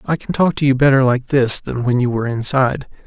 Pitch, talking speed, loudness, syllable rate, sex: 130 Hz, 255 wpm, -16 LUFS, 6.0 syllables/s, male